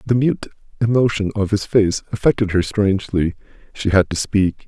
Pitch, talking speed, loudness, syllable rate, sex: 100 Hz, 165 wpm, -18 LUFS, 5.3 syllables/s, male